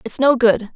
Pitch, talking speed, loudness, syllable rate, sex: 235 Hz, 235 wpm, -15 LUFS, 4.8 syllables/s, female